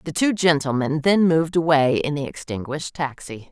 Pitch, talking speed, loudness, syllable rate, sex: 150 Hz, 170 wpm, -21 LUFS, 5.4 syllables/s, female